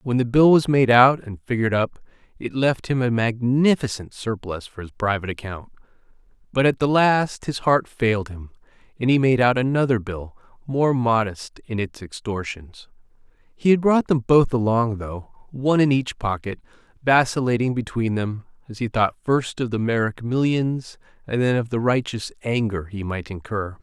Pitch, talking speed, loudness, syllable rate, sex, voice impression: 120 Hz, 175 wpm, -21 LUFS, 4.9 syllables/s, male, masculine, very adult-like, middle-aged, thick, tensed, slightly powerful, slightly bright, hard, clear, fluent, cool, slightly intellectual, slightly refreshing, sincere, very calm, friendly, slightly reassuring, elegant, slightly wild, slightly lively, kind, slightly modest